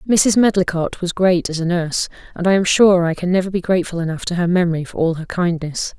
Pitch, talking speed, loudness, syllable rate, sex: 175 Hz, 240 wpm, -18 LUFS, 6.2 syllables/s, female